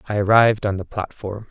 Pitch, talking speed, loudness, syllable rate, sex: 105 Hz, 200 wpm, -19 LUFS, 6.0 syllables/s, male